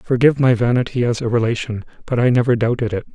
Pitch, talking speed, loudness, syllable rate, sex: 120 Hz, 210 wpm, -18 LUFS, 6.9 syllables/s, male